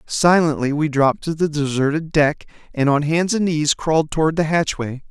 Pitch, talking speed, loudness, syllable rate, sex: 155 Hz, 190 wpm, -18 LUFS, 5.1 syllables/s, male